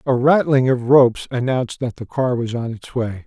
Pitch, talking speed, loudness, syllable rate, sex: 125 Hz, 220 wpm, -18 LUFS, 5.2 syllables/s, male